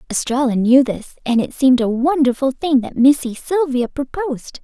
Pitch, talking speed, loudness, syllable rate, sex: 265 Hz, 170 wpm, -17 LUFS, 5.1 syllables/s, female